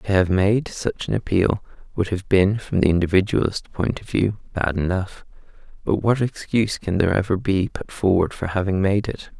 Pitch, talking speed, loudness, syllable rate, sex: 95 Hz, 190 wpm, -21 LUFS, 5.1 syllables/s, male